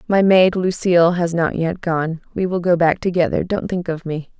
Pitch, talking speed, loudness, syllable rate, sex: 175 Hz, 220 wpm, -18 LUFS, 4.9 syllables/s, female